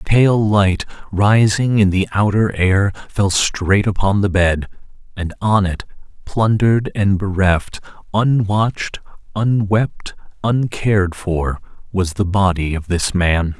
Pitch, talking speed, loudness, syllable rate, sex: 100 Hz, 130 wpm, -17 LUFS, 3.8 syllables/s, male